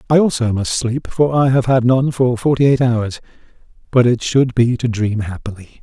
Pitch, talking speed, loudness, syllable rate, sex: 120 Hz, 195 wpm, -16 LUFS, 5.0 syllables/s, male